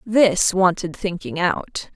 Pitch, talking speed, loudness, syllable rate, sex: 185 Hz, 125 wpm, -20 LUFS, 3.3 syllables/s, female